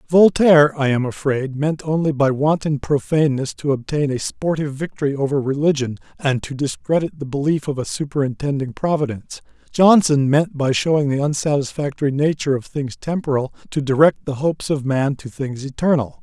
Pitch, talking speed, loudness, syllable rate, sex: 145 Hz, 165 wpm, -19 LUFS, 5.5 syllables/s, male